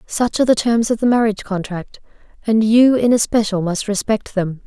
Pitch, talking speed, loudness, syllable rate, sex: 215 Hz, 195 wpm, -17 LUFS, 5.4 syllables/s, female